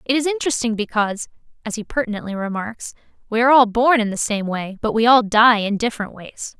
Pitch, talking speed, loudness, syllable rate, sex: 225 Hz, 210 wpm, -18 LUFS, 6.1 syllables/s, female